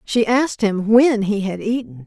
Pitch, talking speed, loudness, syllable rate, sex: 215 Hz, 205 wpm, -18 LUFS, 4.6 syllables/s, female